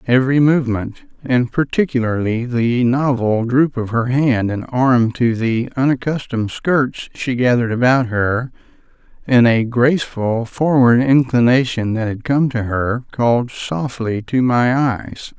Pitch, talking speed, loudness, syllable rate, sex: 125 Hz, 135 wpm, -17 LUFS, 4.2 syllables/s, male